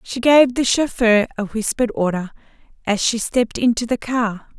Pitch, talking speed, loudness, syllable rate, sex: 230 Hz, 170 wpm, -18 LUFS, 5.3 syllables/s, female